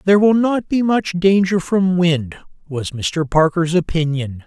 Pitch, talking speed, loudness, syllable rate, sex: 175 Hz, 160 wpm, -17 LUFS, 4.2 syllables/s, male